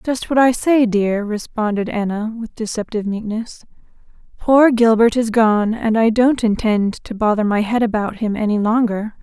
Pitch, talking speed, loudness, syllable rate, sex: 220 Hz, 170 wpm, -17 LUFS, 4.7 syllables/s, female